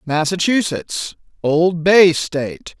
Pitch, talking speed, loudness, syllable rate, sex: 170 Hz, 85 wpm, -16 LUFS, 3.3 syllables/s, male